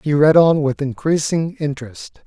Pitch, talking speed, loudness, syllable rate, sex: 150 Hz, 160 wpm, -17 LUFS, 4.6 syllables/s, male